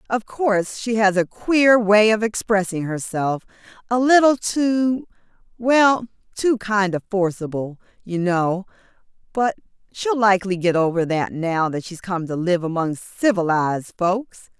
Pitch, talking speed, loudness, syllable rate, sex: 200 Hz, 135 wpm, -20 LUFS, 4.3 syllables/s, female